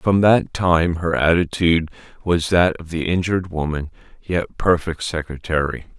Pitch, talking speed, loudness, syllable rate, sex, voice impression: 85 Hz, 140 wpm, -19 LUFS, 4.6 syllables/s, male, very masculine, very adult-like, thick, cool, slightly calm, slightly wild